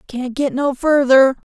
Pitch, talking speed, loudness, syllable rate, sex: 265 Hz, 160 wpm, -15 LUFS, 4.0 syllables/s, female